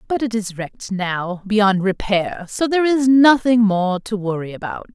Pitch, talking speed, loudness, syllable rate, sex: 210 Hz, 180 wpm, -18 LUFS, 4.5 syllables/s, female